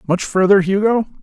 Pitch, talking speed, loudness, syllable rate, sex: 195 Hz, 145 wpm, -15 LUFS, 5.4 syllables/s, male